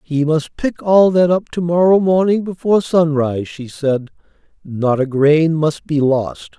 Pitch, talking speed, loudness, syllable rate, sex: 160 Hz, 175 wpm, -15 LUFS, 4.3 syllables/s, male